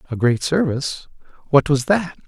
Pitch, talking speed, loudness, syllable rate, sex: 150 Hz, 130 wpm, -19 LUFS, 5.1 syllables/s, male